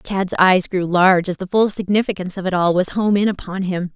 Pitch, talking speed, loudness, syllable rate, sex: 190 Hz, 245 wpm, -18 LUFS, 5.7 syllables/s, female